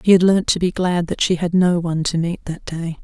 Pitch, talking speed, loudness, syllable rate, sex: 175 Hz, 295 wpm, -18 LUFS, 5.5 syllables/s, female